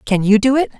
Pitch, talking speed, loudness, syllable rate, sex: 230 Hz, 300 wpm, -14 LUFS, 6.2 syllables/s, female